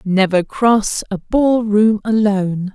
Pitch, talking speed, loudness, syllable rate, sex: 210 Hz, 130 wpm, -16 LUFS, 3.5 syllables/s, female